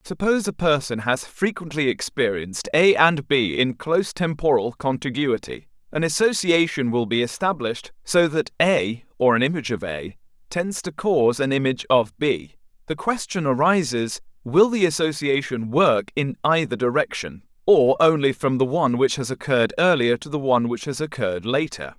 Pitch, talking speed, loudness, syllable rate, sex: 140 Hz, 160 wpm, -21 LUFS, 5.1 syllables/s, male